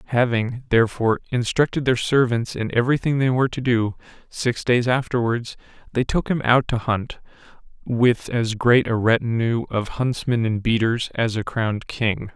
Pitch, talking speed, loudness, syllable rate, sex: 120 Hz, 160 wpm, -21 LUFS, 4.8 syllables/s, male